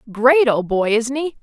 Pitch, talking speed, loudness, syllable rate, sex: 245 Hz, 210 wpm, -17 LUFS, 4.4 syllables/s, female